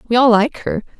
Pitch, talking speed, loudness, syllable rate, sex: 235 Hz, 240 wpm, -15 LUFS, 5.3 syllables/s, female